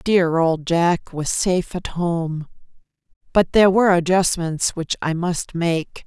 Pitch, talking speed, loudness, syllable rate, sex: 170 Hz, 150 wpm, -19 LUFS, 3.9 syllables/s, female